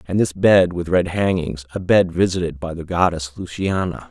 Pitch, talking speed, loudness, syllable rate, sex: 90 Hz, 190 wpm, -19 LUFS, 4.9 syllables/s, male